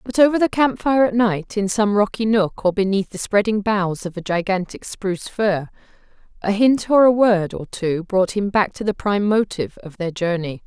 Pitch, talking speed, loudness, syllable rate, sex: 200 Hz, 215 wpm, -19 LUFS, 5.0 syllables/s, female